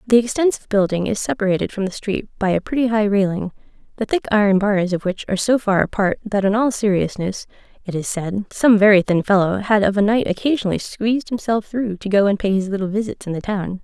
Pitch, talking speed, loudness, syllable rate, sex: 205 Hz, 225 wpm, -19 LUFS, 6.1 syllables/s, female